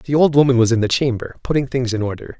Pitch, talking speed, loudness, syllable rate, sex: 125 Hz, 275 wpm, -17 LUFS, 6.6 syllables/s, male